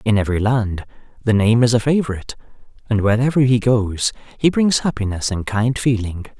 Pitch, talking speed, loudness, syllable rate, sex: 115 Hz, 170 wpm, -18 LUFS, 5.6 syllables/s, male